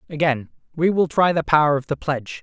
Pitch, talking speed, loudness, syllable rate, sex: 150 Hz, 220 wpm, -20 LUFS, 5.9 syllables/s, male